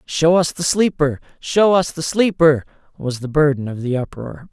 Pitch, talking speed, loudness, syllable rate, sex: 150 Hz, 185 wpm, -18 LUFS, 4.6 syllables/s, male